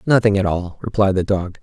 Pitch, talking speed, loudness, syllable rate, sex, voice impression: 100 Hz, 220 wpm, -18 LUFS, 5.4 syllables/s, male, masculine, adult-like, tensed, bright, clear, fluent, cool, intellectual, refreshing, friendly, reassuring, lively, kind, slightly light